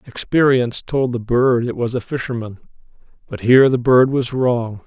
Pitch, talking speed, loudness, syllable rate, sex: 125 Hz, 175 wpm, -17 LUFS, 5.0 syllables/s, male